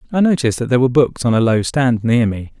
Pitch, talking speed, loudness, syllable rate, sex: 125 Hz, 275 wpm, -16 LUFS, 7.0 syllables/s, male